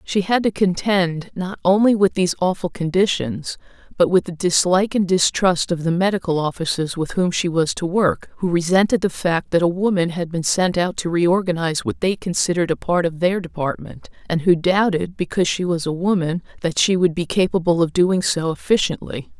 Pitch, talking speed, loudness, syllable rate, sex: 180 Hz, 200 wpm, -19 LUFS, 5.3 syllables/s, female